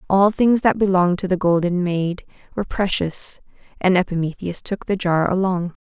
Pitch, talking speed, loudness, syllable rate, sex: 185 Hz, 165 wpm, -20 LUFS, 5.1 syllables/s, female